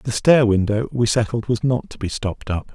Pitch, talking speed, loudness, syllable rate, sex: 115 Hz, 240 wpm, -20 LUFS, 5.2 syllables/s, male